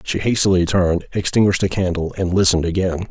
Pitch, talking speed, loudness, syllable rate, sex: 90 Hz, 175 wpm, -18 LUFS, 6.6 syllables/s, male